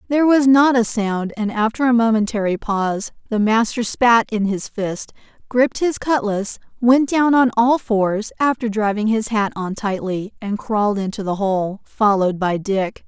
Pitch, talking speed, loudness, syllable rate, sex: 220 Hz, 175 wpm, -18 LUFS, 4.6 syllables/s, female